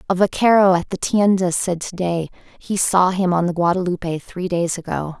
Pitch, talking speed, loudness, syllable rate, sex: 180 Hz, 195 wpm, -19 LUFS, 5.0 syllables/s, female